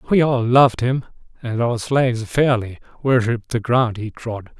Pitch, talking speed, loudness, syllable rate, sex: 120 Hz, 170 wpm, -19 LUFS, 4.8 syllables/s, male